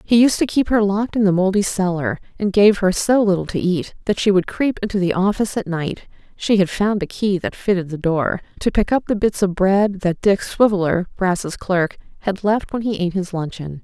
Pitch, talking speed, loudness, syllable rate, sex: 195 Hz, 235 wpm, -19 LUFS, 4.7 syllables/s, female